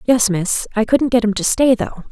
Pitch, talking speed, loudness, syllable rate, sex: 225 Hz, 255 wpm, -16 LUFS, 4.8 syllables/s, female